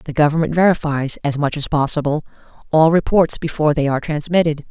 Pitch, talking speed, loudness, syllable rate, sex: 155 Hz, 165 wpm, -17 LUFS, 6.1 syllables/s, female